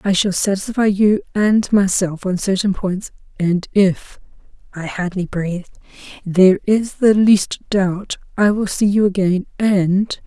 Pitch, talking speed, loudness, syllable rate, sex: 195 Hz, 145 wpm, -17 LUFS, 4.2 syllables/s, female